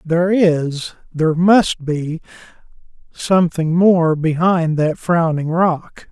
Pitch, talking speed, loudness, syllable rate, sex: 165 Hz, 90 wpm, -16 LUFS, 3.4 syllables/s, male